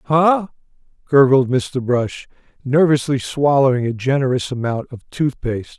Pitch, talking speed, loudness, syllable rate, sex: 135 Hz, 125 wpm, -17 LUFS, 4.6 syllables/s, male